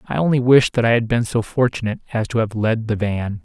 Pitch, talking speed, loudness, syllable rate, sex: 115 Hz, 260 wpm, -19 LUFS, 6.1 syllables/s, male